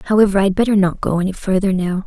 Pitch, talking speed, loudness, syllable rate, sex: 195 Hz, 235 wpm, -16 LUFS, 7.0 syllables/s, female